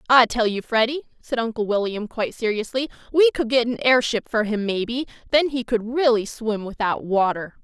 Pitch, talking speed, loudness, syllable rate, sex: 230 Hz, 190 wpm, -22 LUFS, 5.2 syllables/s, female